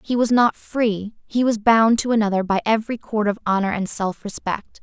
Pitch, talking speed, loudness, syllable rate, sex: 215 Hz, 200 wpm, -20 LUFS, 5.1 syllables/s, female